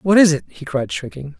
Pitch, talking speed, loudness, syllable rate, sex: 155 Hz, 260 wpm, -18 LUFS, 5.4 syllables/s, male